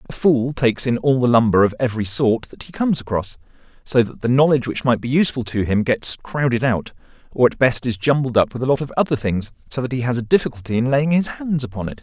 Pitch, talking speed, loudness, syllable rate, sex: 125 Hz, 255 wpm, -19 LUFS, 6.3 syllables/s, male